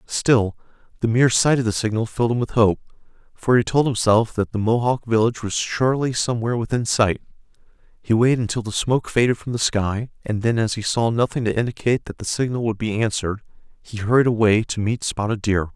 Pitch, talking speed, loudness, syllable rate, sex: 115 Hz, 205 wpm, -20 LUFS, 6.1 syllables/s, male